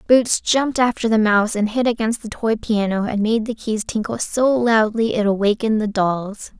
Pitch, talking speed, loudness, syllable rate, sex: 220 Hz, 200 wpm, -19 LUFS, 5.0 syllables/s, female